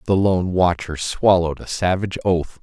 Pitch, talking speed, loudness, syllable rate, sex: 90 Hz, 160 wpm, -19 LUFS, 5.0 syllables/s, male